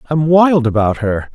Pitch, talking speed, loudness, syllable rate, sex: 140 Hz, 180 wpm, -13 LUFS, 4.1 syllables/s, male